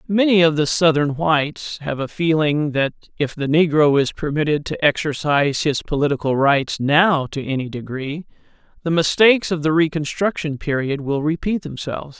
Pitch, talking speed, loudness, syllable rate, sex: 150 Hz, 160 wpm, -19 LUFS, 5.0 syllables/s, male